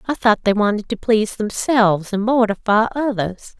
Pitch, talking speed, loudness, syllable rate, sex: 215 Hz, 165 wpm, -18 LUFS, 5.1 syllables/s, female